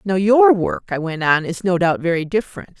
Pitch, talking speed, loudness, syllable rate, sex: 185 Hz, 235 wpm, -17 LUFS, 5.3 syllables/s, female